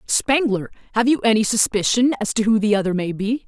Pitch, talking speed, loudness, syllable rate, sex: 220 Hz, 205 wpm, -19 LUFS, 5.7 syllables/s, female